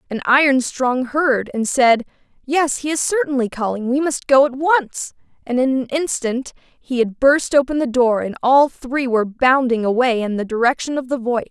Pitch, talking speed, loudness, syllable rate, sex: 260 Hz, 200 wpm, -18 LUFS, 4.8 syllables/s, female